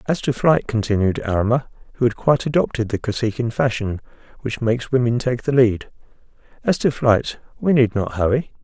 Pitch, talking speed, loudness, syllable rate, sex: 120 Hz, 165 wpm, -20 LUFS, 5.4 syllables/s, male